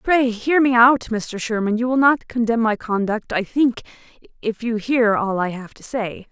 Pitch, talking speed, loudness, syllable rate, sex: 230 Hz, 210 wpm, -19 LUFS, 4.5 syllables/s, female